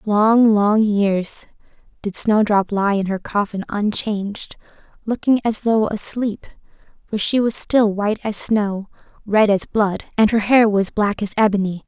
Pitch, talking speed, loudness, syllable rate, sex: 210 Hz, 155 wpm, -18 LUFS, 4.2 syllables/s, female